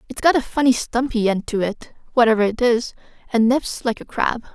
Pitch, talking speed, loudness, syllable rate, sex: 235 Hz, 210 wpm, -20 LUFS, 5.4 syllables/s, female